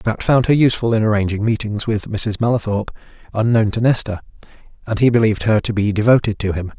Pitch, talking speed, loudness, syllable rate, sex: 110 Hz, 195 wpm, -17 LUFS, 6.4 syllables/s, male